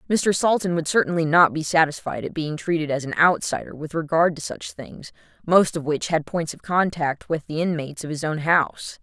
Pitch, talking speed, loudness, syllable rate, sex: 160 Hz, 215 wpm, -22 LUFS, 5.3 syllables/s, female